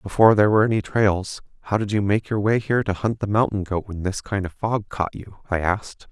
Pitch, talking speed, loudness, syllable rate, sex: 100 Hz, 255 wpm, -22 LUFS, 6.0 syllables/s, male